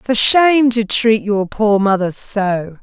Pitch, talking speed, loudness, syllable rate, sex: 215 Hz, 170 wpm, -14 LUFS, 3.6 syllables/s, female